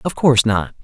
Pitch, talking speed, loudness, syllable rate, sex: 125 Hz, 215 wpm, -15 LUFS, 5.9 syllables/s, male